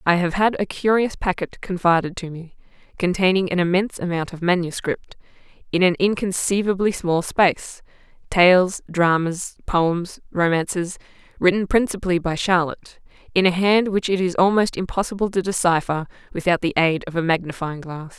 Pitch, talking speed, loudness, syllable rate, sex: 180 Hz, 150 wpm, -20 LUFS, 5.1 syllables/s, female